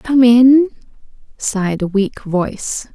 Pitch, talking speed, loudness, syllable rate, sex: 230 Hz, 120 wpm, -15 LUFS, 3.7 syllables/s, female